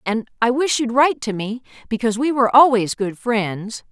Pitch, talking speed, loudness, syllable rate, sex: 235 Hz, 200 wpm, -18 LUFS, 5.3 syllables/s, female